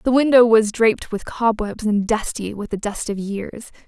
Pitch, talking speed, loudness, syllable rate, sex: 220 Hz, 200 wpm, -19 LUFS, 4.7 syllables/s, female